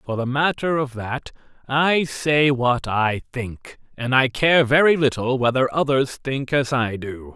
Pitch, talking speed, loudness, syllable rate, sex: 135 Hz, 170 wpm, -20 LUFS, 4.0 syllables/s, male